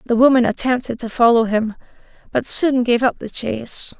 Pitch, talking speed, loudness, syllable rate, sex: 240 Hz, 180 wpm, -18 LUFS, 5.1 syllables/s, female